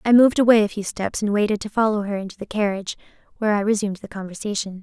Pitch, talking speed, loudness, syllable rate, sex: 205 Hz, 235 wpm, -21 LUFS, 7.4 syllables/s, female